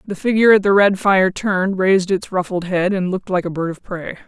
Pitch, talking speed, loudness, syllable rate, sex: 190 Hz, 255 wpm, -17 LUFS, 5.9 syllables/s, female